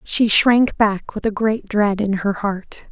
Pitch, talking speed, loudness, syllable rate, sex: 210 Hz, 205 wpm, -18 LUFS, 3.7 syllables/s, female